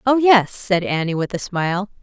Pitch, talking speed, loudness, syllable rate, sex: 195 Hz, 210 wpm, -18 LUFS, 5.0 syllables/s, female